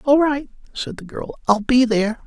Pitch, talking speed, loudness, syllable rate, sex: 245 Hz, 210 wpm, -20 LUFS, 5.0 syllables/s, male